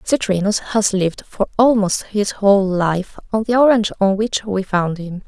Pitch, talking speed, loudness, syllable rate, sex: 200 Hz, 180 wpm, -17 LUFS, 4.7 syllables/s, female